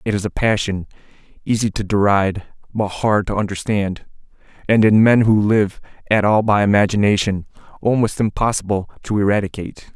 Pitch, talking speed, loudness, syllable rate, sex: 105 Hz, 145 wpm, -18 LUFS, 5.5 syllables/s, male